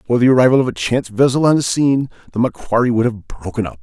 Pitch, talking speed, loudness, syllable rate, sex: 120 Hz, 250 wpm, -16 LUFS, 7.3 syllables/s, male